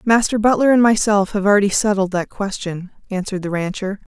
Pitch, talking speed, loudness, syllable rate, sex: 205 Hz, 175 wpm, -18 LUFS, 5.8 syllables/s, female